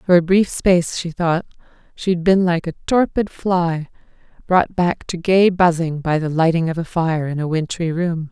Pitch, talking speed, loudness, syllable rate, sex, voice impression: 170 Hz, 200 wpm, -18 LUFS, 4.7 syllables/s, female, feminine, adult-like, slightly powerful, soft, fluent, intellectual, calm, friendly, reassuring, elegant, lively, kind